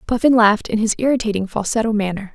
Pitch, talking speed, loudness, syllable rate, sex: 215 Hz, 180 wpm, -18 LUFS, 6.9 syllables/s, female